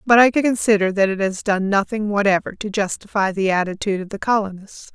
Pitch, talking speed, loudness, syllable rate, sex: 200 Hz, 195 wpm, -19 LUFS, 5.9 syllables/s, female